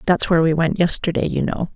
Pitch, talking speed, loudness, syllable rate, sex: 165 Hz, 240 wpm, -19 LUFS, 6.3 syllables/s, female